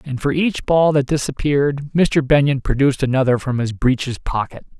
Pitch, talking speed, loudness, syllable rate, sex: 140 Hz, 175 wpm, -18 LUFS, 5.3 syllables/s, male